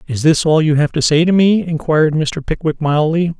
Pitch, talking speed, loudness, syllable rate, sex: 155 Hz, 230 wpm, -14 LUFS, 5.3 syllables/s, male